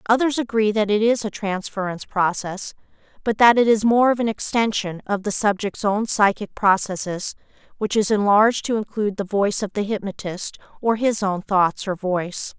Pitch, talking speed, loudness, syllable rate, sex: 210 Hz, 180 wpm, -21 LUFS, 5.2 syllables/s, female